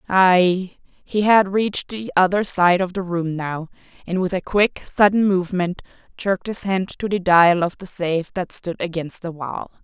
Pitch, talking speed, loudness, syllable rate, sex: 185 Hz, 185 wpm, -20 LUFS, 4.6 syllables/s, female